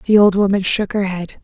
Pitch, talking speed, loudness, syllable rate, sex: 195 Hz, 250 wpm, -16 LUFS, 5.5 syllables/s, female